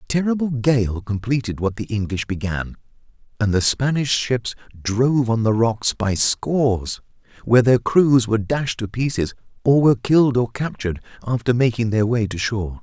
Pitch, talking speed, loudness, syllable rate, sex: 115 Hz, 170 wpm, -20 LUFS, 5.0 syllables/s, male